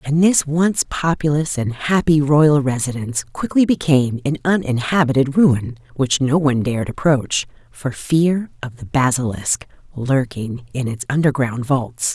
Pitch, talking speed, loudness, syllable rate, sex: 140 Hz, 140 wpm, -18 LUFS, 4.4 syllables/s, female